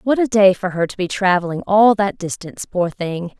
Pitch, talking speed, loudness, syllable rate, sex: 195 Hz, 230 wpm, -17 LUFS, 5.2 syllables/s, female